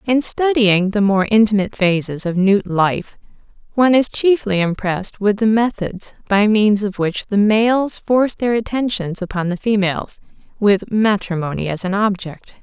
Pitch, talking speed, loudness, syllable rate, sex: 205 Hz, 155 wpm, -17 LUFS, 4.7 syllables/s, female